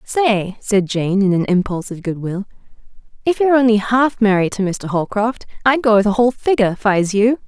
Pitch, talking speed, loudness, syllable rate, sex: 215 Hz, 195 wpm, -17 LUFS, 5.2 syllables/s, female